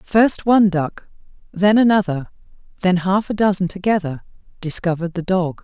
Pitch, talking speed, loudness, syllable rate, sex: 185 Hz, 140 wpm, -18 LUFS, 5.1 syllables/s, female